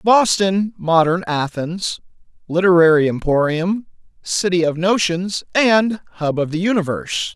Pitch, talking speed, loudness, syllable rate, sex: 180 Hz, 105 wpm, -17 LUFS, 4.3 syllables/s, male